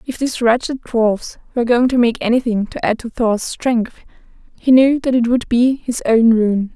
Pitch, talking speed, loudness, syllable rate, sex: 235 Hz, 205 wpm, -16 LUFS, 4.8 syllables/s, female